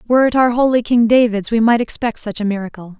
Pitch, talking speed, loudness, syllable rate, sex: 230 Hz, 240 wpm, -15 LUFS, 6.3 syllables/s, female